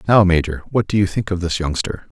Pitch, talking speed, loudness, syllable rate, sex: 95 Hz, 245 wpm, -19 LUFS, 5.9 syllables/s, male